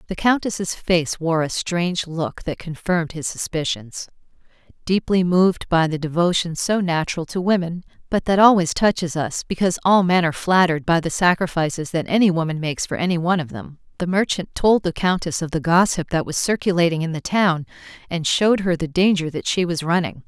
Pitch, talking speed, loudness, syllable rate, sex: 170 Hz, 190 wpm, -20 LUFS, 5.6 syllables/s, female